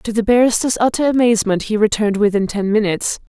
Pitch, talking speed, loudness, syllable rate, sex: 220 Hz, 180 wpm, -16 LUFS, 6.7 syllables/s, female